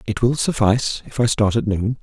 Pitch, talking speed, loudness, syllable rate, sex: 110 Hz, 235 wpm, -19 LUFS, 5.4 syllables/s, male